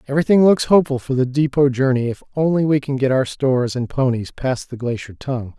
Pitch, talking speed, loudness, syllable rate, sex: 135 Hz, 215 wpm, -18 LUFS, 6.1 syllables/s, male